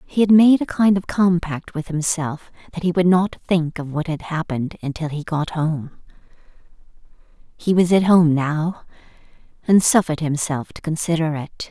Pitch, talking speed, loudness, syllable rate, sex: 165 Hz, 170 wpm, -19 LUFS, 4.9 syllables/s, female